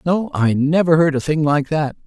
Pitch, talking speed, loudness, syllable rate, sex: 150 Hz, 235 wpm, -17 LUFS, 4.9 syllables/s, male